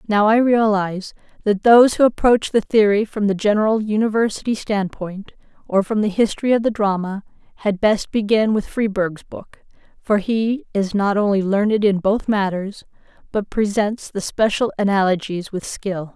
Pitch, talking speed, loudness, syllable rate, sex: 205 Hz, 160 wpm, -19 LUFS, 4.9 syllables/s, female